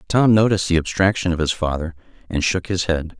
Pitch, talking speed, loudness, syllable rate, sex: 90 Hz, 205 wpm, -19 LUFS, 5.9 syllables/s, male